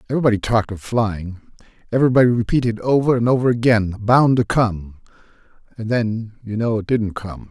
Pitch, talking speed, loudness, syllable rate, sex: 115 Hz, 160 wpm, -18 LUFS, 5.8 syllables/s, male